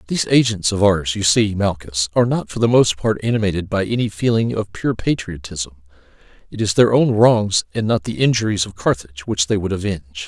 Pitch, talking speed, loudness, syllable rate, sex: 100 Hz, 205 wpm, -18 LUFS, 5.7 syllables/s, male